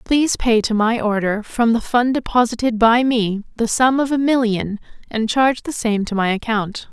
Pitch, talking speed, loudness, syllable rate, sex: 230 Hz, 200 wpm, -18 LUFS, 4.9 syllables/s, female